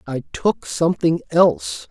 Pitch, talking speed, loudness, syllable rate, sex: 155 Hz, 125 wpm, -19 LUFS, 4.2 syllables/s, male